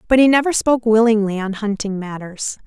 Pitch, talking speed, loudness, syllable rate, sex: 220 Hz, 180 wpm, -17 LUFS, 5.8 syllables/s, female